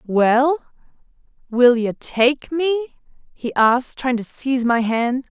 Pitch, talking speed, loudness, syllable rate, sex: 255 Hz, 135 wpm, -19 LUFS, 3.6 syllables/s, female